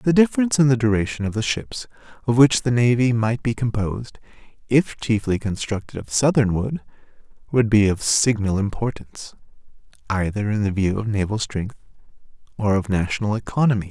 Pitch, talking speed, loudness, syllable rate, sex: 110 Hz, 160 wpm, -21 LUFS, 5.6 syllables/s, male